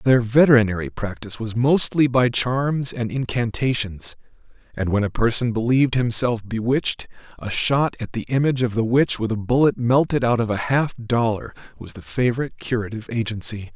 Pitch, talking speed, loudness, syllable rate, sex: 120 Hz, 165 wpm, -21 LUFS, 5.4 syllables/s, male